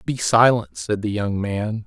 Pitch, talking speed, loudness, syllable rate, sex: 110 Hz, 195 wpm, -20 LUFS, 4.0 syllables/s, male